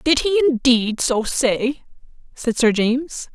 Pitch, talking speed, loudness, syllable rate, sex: 255 Hz, 145 wpm, -18 LUFS, 3.9 syllables/s, female